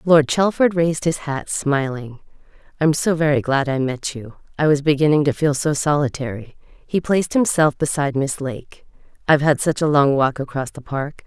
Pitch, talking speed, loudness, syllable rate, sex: 145 Hz, 190 wpm, -19 LUFS, 5.2 syllables/s, female